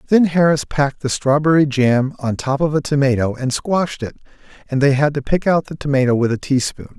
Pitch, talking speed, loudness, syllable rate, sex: 140 Hz, 215 wpm, -17 LUFS, 5.8 syllables/s, male